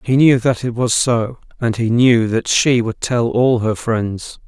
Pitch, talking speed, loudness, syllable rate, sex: 120 Hz, 215 wpm, -16 LUFS, 3.9 syllables/s, male